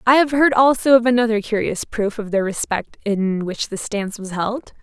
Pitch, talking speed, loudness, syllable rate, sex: 225 Hz, 210 wpm, -19 LUFS, 5.0 syllables/s, female